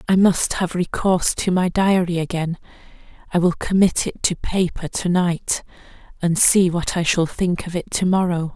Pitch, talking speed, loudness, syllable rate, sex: 175 Hz, 180 wpm, -20 LUFS, 4.7 syllables/s, female